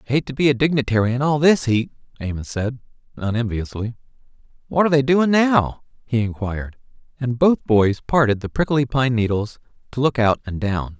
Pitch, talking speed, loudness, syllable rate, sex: 125 Hz, 175 wpm, -20 LUFS, 5.3 syllables/s, male